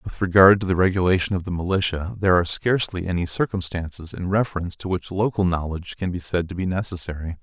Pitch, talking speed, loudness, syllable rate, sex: 90 Hz, 200 wpm, -22 LUFS, 6.6 syllables/s, male